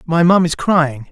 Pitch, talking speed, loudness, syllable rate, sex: 165 Hz, 215 wpm, -14 LUFS, 4.0 syllables/s, male